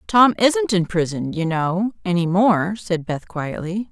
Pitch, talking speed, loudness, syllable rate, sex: 185 Hz, 170 wpm, -20 LUFS, 3.9 syllables/s, female